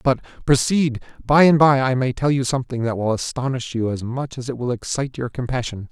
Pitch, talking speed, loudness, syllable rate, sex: 130 Hz, 225 wpm, -20 LUFS, 5.8 syllables/s, male